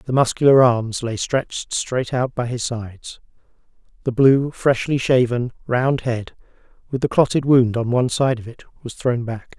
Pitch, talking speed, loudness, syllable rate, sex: 125 Hz, 175 wpm, -19 LUFS, 4.6 syllables/s, male